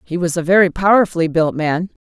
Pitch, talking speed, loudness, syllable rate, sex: 175 Hz, 205 wpm, -15 LUFS, 5.9 syllables/s, female